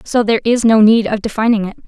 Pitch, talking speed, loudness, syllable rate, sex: 220 Hz, 255 wpm, -13 LUFS, 6.7 syllables/s, female